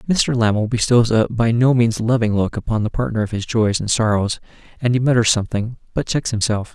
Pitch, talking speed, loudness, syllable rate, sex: 115 Hz, 215 wpm, -18 LUFS, 5.7 syllables/s, male